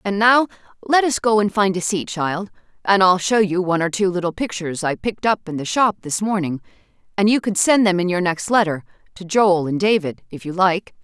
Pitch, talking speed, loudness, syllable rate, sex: 190 Hz, 235 wpm, -19 LUFS, 5.5 syllables/s, female